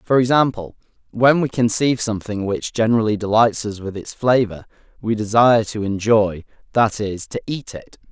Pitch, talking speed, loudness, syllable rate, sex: 110 Hz, 165 wpm, -19 LUFS, 5.3 syllables/s, male